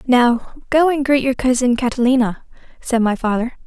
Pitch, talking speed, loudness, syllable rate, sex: 250 Hz, 165 wpm, -17 LUFS, 5.1 syllables/s, female